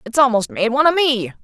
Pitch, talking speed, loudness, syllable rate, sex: 245 Hz, 250 wpm, -16 LUFS, 6.4 syllables/s, female